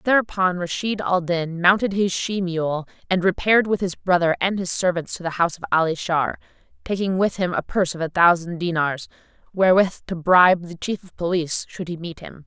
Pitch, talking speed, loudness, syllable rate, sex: 180 Hz, 200 wpm, -21 LUFS, 5.5 syllables/s, female